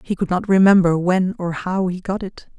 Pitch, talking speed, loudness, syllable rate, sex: 185 Hz, 230 wpm, -18 LUFS, 5.0 syllables/s, female